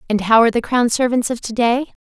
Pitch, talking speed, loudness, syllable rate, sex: 235 Hz, 265 wpm, -16 LUFS, 6.2 syllables/s, female